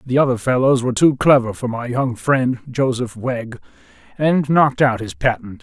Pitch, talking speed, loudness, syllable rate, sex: 125 Hz, 180 wpm, -18 LUFS, 4.9 syllables/s, male